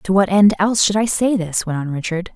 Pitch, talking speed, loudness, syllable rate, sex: 190 Hz, 280 wpm, -17 LUFS, 5.8 syllables/s, female